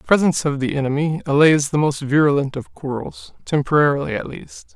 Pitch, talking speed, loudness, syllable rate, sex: 145 Hz, 175 wpm, -19 LUFS, 5.7 syllables/s, male